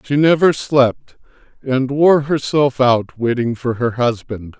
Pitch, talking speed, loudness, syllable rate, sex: 130 Hz, 145 wpm, -16 LUFS, 3.7 syllables/s, male